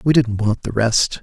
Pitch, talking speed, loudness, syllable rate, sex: 120 Hz, 245 wpm, -18 LUFS, 4.4 syllables/s, male